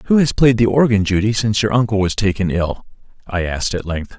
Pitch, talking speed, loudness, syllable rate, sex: 105 Hz, 230 wpm, -17 LUFS, 5.9 syllables/s, male